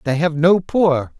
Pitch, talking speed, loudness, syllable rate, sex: 160 Hz, 200 wpm, -16 LUFS, 3.9 syllables/s, male